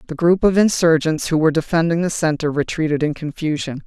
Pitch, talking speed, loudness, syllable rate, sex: 160 Hz, 185 wpm, -18 LUFS, 6.0 syllables/s, female